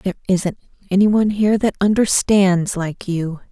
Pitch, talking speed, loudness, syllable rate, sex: 195 Hz, 135 wpm, -17 LUFS, 5.2 syllables/s, female